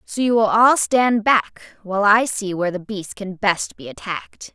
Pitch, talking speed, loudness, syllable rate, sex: 205 Hz, 210 wpm, -18 LUFS, 4.7 syllables/s, female